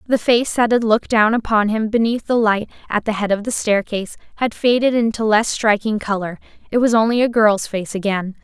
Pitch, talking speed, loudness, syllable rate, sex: 220 Hz, 215 wpm, -18 LUFS, 5.4 syllables/s, female